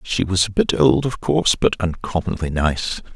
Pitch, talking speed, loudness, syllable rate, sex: 95 Hz, 190 wpm, -19 LUFS, 4.8 syllables/s, male